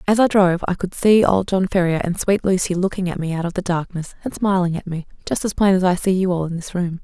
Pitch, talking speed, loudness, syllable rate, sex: 180 Hz, 290 wpm, -19 LUFS, 6.1 syllables/s, female